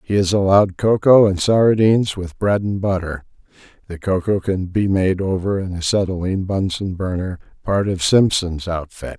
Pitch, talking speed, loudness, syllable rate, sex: 95 Hz, 150 wpm, -18 LUFS, 4.9 syllables/s, male